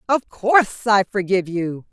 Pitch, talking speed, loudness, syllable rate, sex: 205 Hz, 155 wpm, -19 LUFS, 5.5 syllables/s, female